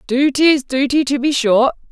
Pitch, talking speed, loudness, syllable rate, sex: 270 Hz, 190 wpm, -15 LUFS, 5.0 syllables/s, female